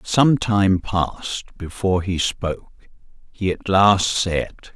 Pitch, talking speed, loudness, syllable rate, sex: 95 Hz, 125 wpm, -20 LUFS, 3.6 syllables/s, male